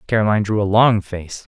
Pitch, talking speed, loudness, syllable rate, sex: 105 Hz, 195 wpm, -17 LUFS, 5.9 syllables/s, male